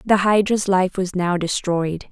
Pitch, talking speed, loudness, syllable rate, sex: 190 Hz, 170 wpm, -19 LUFS, 4.1 syllables/s, female